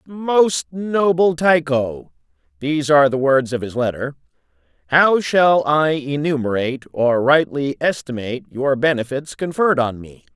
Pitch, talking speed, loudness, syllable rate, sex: 145 Hz, 130 wpm, -18 LUFS, 3.7 syllables/s, male